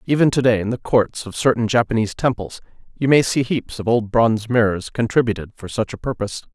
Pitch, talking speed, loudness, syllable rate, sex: 115 Hz, 210 wpm, -19 LUFS, 6.1 syllables/s, male